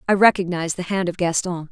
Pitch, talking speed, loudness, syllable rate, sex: 180 Hz, 210 wpm, -20 LUFS, 6.5 syllables/s, female